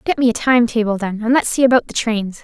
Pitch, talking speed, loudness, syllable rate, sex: 230 Hz, 295 wpm, -16 LUFS, 6.0 syllables/s, female